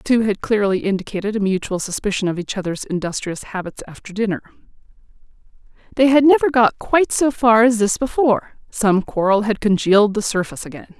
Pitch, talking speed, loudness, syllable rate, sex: 210 Hz, 175 wpm, -18 LUFS, 5.9 syllables/s, female